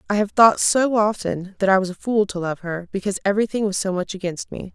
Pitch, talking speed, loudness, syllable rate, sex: 200 Hz, 255 wpm, -20 LUFS, 6.1 syllables/s, female